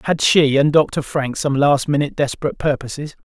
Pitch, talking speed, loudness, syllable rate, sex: 140 Hz, 185 wpm, -17 LUFS, 5.6 syllables/s, male